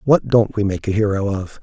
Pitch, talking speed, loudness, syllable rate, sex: 105 Hz, 260 wpm, -18 LUFS, 5.3 syllables/s, male